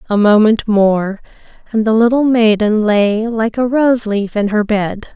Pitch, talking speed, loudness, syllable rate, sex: 215 Hz, 175 wpm, -13 LUFS, 4.2 syllables/s, female